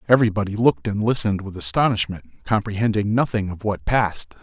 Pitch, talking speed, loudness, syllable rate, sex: 105 Hz, 150 wpm, -21 LUFS, 6.5 syllables/s, male